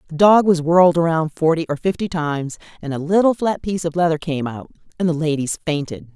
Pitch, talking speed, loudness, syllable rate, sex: 165 Hz, 205 wpm, -18 LUFS, 6.0 syllables/s, female